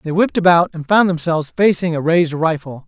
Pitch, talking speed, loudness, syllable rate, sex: 165 Hz, 210 wpm, -16 LUFS, 6.3 syllables/s, male